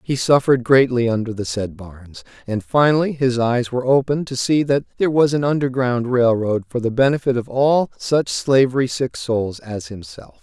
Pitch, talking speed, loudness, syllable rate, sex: 125 Hz, 190 wpm, -18 LUFS, 5.1 syllables/s, male